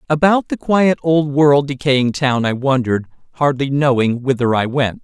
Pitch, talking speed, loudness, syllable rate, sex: 140 Hz, 165 wpm, -16 LUFS, 4.7 syllables/s, male